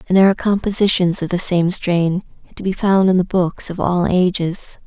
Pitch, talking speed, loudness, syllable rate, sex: 185 Hz, 210 wpm, -17 LUFS, 5.3 syllables/s, female